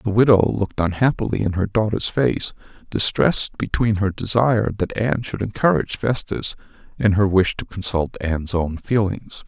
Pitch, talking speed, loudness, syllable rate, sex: 105 Hz, 160 wpm, -20 LUFS, 5.1 syllables/s, male